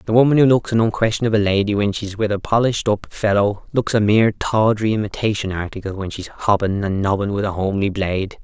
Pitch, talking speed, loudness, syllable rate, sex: 105 Hz, 205 wpm, -19 LUFS, 6.1 syllables/s, male